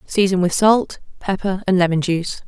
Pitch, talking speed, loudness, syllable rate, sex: 185 Hz, 170 wpm, -18 LUFS, 5.2 syllables/s, female